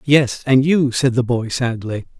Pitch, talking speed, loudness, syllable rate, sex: 125 Hz, 190 wpm, -17 LUFS, 4.1 syllables/s, male